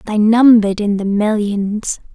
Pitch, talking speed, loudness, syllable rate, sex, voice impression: 210 Hz, 140 wpm, -14 LUFS, 4.3 syllables/s, female, very feminine, very young, very thin, very relaxed, slightly weak, bright, very soft, clear, fluent, slightly raspy, very cute, intellectual, very refreshing, sincere, calm, very friendly, very reassuring, very unique, very elegant, slightly wild, very sweet, lively, very kind, slightly intense, slightly sharp, very light